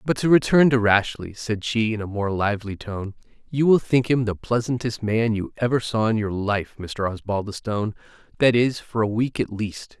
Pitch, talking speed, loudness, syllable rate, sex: 110 Hz, 200 wpm, -22 LUFS, 5.0 syllables/s, male